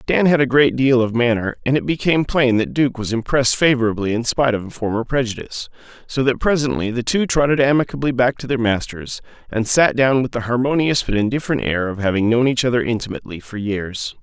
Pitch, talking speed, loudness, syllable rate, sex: 120 Hz, 205 wpm, -18 LUFS, 6.0 syllables/s, male